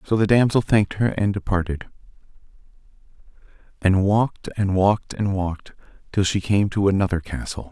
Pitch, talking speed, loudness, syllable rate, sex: 100 Hz, 150 wpm, -21 LUFS, 5.5 syllables/s, male